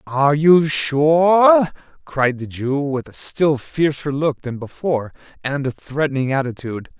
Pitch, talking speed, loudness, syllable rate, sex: 145 Hz, 145 wpm, -18 LUFS, 4.3 syllables/s, male